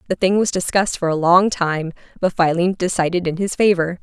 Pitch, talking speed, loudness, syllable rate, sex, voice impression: 180 Hz, 210 wpm, -18 LUFS, 5.9 syllables/s, female, very feminine, very adult-like, thin, tensed, powerful, slightly bright, slightly soft, very clear, very fluent, very cool, very intellectual, very refreshing, sincere, slightly calm, very friendly, very reassuring, unique, elegant, wild, sweet, lively, kind, slightly intense, slightly light